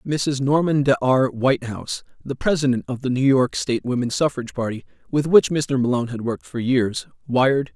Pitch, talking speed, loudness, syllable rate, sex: 130 Hz, 185 wpm, -21 LUFS, 5.6 syllables/s, male